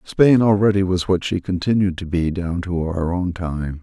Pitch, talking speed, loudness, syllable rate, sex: 90 Hz, 205 wpm, -19 LUFS, 4.6 syllables/s, male